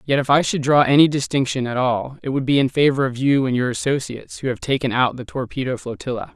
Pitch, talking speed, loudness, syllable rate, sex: 130 Hz, 245 wpm, -19 LUFS, 6.2 syllables/s, male